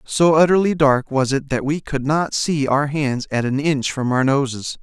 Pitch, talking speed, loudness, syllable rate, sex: 140 Hz, 225 wpm, -18 LUFS, 4.5 syllables/s, male